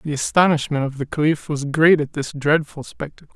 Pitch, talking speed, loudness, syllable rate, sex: 150 Hz, 195 wpm, -19 LUFS, 5.5 syllables/s, male